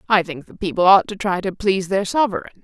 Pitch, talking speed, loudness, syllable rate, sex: 190 Hz, 250 wpm, -19 LUFS, 6.6 syllables/s, female